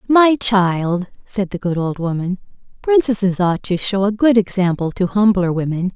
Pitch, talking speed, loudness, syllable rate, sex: 195 Hz, 170 wpm, -17 LUFS, 4.6 syllables/s, female